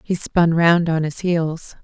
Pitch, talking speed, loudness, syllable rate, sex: 165 Hz, 195 wpm, -18 LUFS, 3.6 syllables/s, female